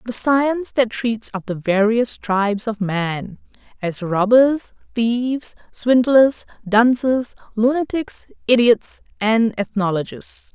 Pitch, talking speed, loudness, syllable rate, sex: 225 Hz, 110 wpm, -18 LUFS, 3.6 syllables/s, female